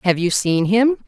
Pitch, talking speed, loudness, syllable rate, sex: 205 Hz, 220 wpm, -17 LUFS, 4.3 syllables/s, female